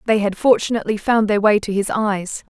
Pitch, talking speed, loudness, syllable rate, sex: 210 Hz, 210 wpm, -18 LUFS, 5.6 syllables/s, female